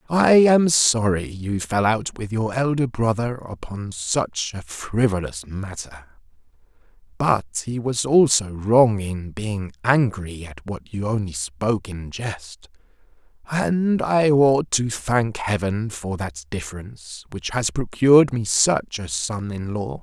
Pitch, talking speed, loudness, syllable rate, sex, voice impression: 110 Hz, 145 wpm, -21 LUFS, 3.7 syllables/s, male, masculine, middle-aged, powerful, raspy, mature, wild, lively, strict, intense, slightly sharp